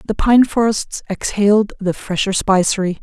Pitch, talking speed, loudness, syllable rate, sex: 200 Hz, 140 wpm, -16 LUFS, 4.8 syllables/s, female